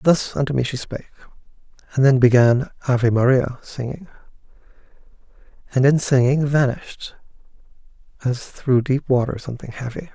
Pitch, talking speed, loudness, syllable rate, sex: 130 Hz, 125 wpm, -19 LUFS, 5.4 syllables/s, male